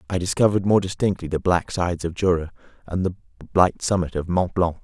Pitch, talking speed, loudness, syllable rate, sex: 90 Hz, 200 wpm, -22 LUFS, 6.1 syllables/s, male